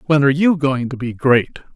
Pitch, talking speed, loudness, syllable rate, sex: 140 Hz, 240 wpm, -16 LUFS, 5.5 syllables/s, male